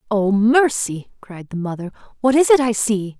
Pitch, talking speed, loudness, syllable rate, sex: 220 Hz, 190 wpm, -17 LUFS, 4.6 syllables/s, female